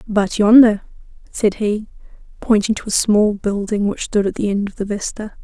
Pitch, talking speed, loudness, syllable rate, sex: 210 Hz, 190 wpm, -17 LUFS, 4.9 syllables/s, female